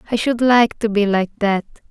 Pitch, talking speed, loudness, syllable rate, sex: 220 Hz, 220 wpm, -17 LUFS, 4.8 syllables/s, female